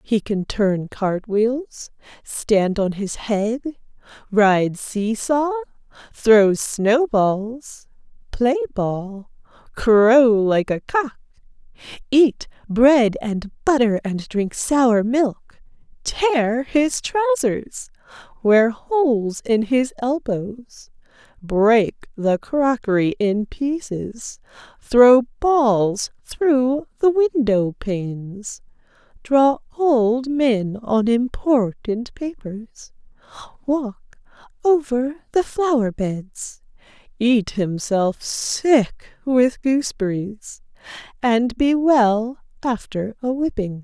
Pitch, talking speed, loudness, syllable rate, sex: 240 Hz, 90 wpm, -19 LUFS, 2.8 syllables/s, female